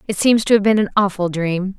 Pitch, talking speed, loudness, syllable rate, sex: 195 Hz, 270 wpm, -17 LUFS, 5.8 syllables/s, female